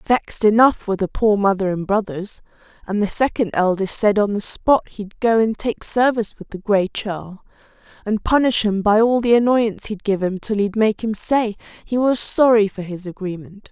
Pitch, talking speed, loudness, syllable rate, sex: 210 Hz, 200 wpm, -19 LUFS, 5.0 syllables/s, female